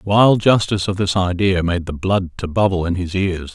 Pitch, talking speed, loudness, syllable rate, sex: 95 Hz, 235 wpm, -18 LUFS, 5.3 syllables/s, male